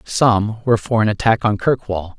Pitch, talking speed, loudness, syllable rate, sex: 110 Hz, 190 wpm, -17 LUFS, 4.9 syllables/s, male